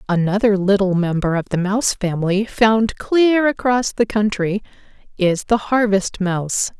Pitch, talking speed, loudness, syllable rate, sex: 205 Hz, 140 wpm, -18 LUFS, 4.5 syllables/s, female